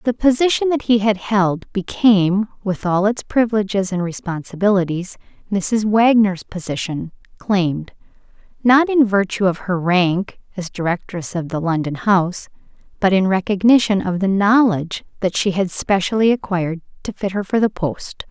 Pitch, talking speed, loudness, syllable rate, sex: 200 Hz, 150 wpm, -18 LUFS, 4.9 syllables/s, female